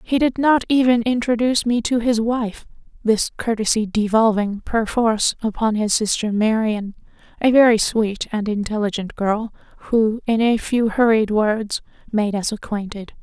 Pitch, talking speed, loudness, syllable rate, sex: 220 Hz, 140 wpm, -19 LUFS, 4.6 syllables/s, female